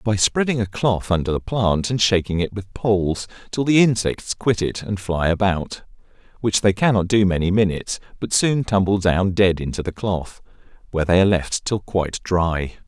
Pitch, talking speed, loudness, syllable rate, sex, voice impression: 100 Hz, 190 wpm, -20 LUFS, 5.0 syllables/s, male, very masculine, middle-aged, very thick, tensed, very powerful, bright, very soft, very clear, very fluent, very cool, very intellectual, refreshing, very sincere, very calm, very mature, very friendly, very reassuring, very unique, very elegant, slightly wild, very sweet, lively, very kind, slightly modest